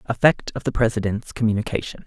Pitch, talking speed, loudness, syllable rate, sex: 110 Hz, 145 wpm, -22 LUFS, 6.2 syllables/s, male